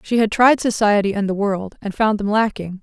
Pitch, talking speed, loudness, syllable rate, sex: 210 Hz, 235 wpm, -18 LUFS, 5.2 syllables/s, female